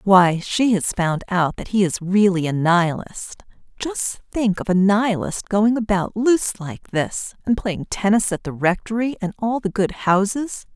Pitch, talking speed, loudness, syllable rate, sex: 200 Hz, 175 wpm, -20 LUFS, 4.4 syllables/s, female